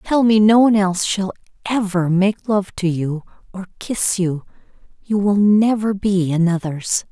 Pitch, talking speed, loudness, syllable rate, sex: 195 Hz, 150 wpm, -17 LUFS, 4.5 syllables/s, female